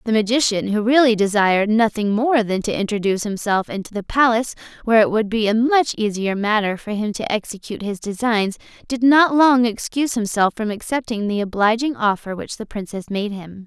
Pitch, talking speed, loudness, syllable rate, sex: 220 Hz, 190 wpm, -19 LUFS, 5.6 syllables/s, female